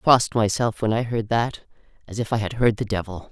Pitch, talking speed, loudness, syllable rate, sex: 110 Hz, 255 wpm, -23 LUFS, 6.4 syllables/s, female